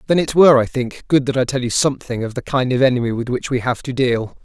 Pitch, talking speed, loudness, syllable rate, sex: 130 Hz, 295 wpm, -17 LUFS, 6.4 syllables/s, male